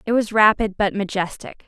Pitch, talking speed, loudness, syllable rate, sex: 205 Hz, 180 wpm, -19 LUFS, 5.2 syllables/s, female